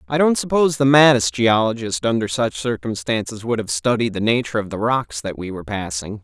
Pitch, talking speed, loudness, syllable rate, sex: 115 Hz, 200 wpm, -19 LUFS, 5.8 syllables/s, male